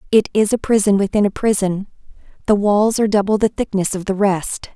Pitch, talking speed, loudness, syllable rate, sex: 205 Hz, 200 wpm, -17 LUFS, 5.7 syllables/s, female